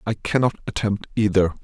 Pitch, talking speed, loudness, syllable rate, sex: 105 Hz, 145 wpm, -22 LUFS, 5.6 syllables/s, male